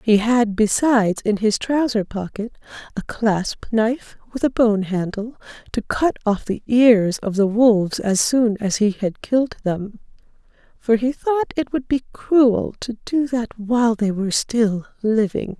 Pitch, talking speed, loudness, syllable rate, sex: 225 Hz, 170 wpm, -19 LUFS, 4.2 syllables/s, female